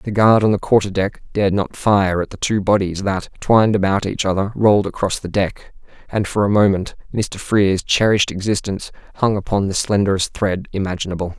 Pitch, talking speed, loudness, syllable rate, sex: 100 Hz, 190 wpm, -18 LUFS, 5.7 syllables/s, male